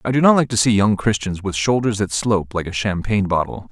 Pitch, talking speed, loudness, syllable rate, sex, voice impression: 105 Hz, 260 wpm, -18 LUFS, 6.1 syllables/s, male, masculine, adult-like, tensed, powerful, slightly hard, cool, intellectual, calm, mature, reassuring, wild, lively, kind